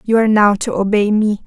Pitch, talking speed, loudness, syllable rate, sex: 210 Hz, 245 wpm, -14 LUFS, 6.2 syllables/s, female